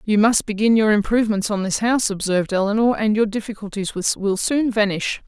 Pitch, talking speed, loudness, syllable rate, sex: 210 Hz, 180 wpm, -19 LUFS, 5.6 syllables/s, female